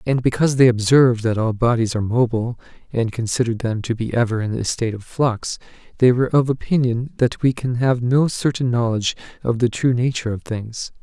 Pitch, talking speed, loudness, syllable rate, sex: 120 Hz, 200 wpm, -19 LUFS, 5.9 syllables/s, male